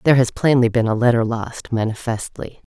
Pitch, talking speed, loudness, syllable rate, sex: 120 Hz, 175 wpm, -19 LUFS, 5.5 syllables/s, female